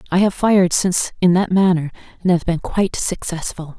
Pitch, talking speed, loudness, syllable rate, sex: 180 Hz, 190 wpm, -18 LUFS, 5.7 syllables/s, female